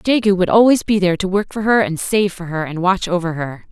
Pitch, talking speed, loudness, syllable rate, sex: 190 Hz, 275 wpm, -17 LUFS, 5.9 syllables/s, female